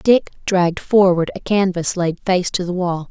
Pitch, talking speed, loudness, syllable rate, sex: 180 Hz, 195 wpm, -18 LUFS, 4.5 syllables/s, female